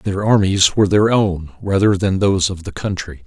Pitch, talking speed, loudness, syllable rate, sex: 95 Hz, 200 wpm, -16 LUFS, 5.1 syllables/s, male